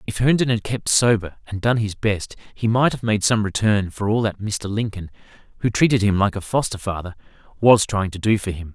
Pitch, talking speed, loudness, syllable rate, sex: 105 Hz, 225 wpm, -20 LUFS, 5.4 syllables/s, male